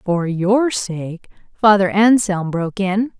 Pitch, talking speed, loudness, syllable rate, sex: 200 Hz, 130 wpm, -17 LUFS, 3.6 syllables/s, female